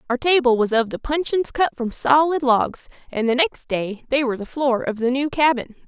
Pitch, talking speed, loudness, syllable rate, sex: 265 Hz, 225 wpm, -20 LUFS, 5.1 syllables/s, female